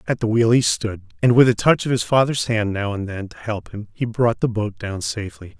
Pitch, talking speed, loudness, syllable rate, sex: 110 Hz, 270 wpm, -20 LUFS, 5.3 syllables/s, male